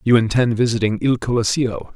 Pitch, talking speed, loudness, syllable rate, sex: 115 Hz, 155 wpm, -18 LUFS, 5.5 syllables/s, male